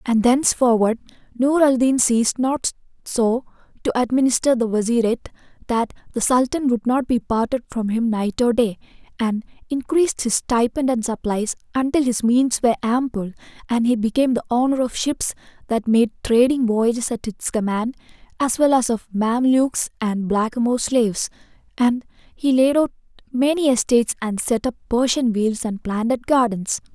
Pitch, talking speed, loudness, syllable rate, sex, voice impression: 240 Hz, 160 wpm, -20 LUFS, 5.1 syllables/s, female, feminine, adult-like, slightly relaxed, bright, soft, raspy, intellectual, calm, slightly friendly, lively, slightly modest